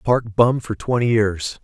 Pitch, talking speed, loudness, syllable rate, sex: 110 Hz, 185 wpm, -19 LUFS, 3.9 syllables/s, male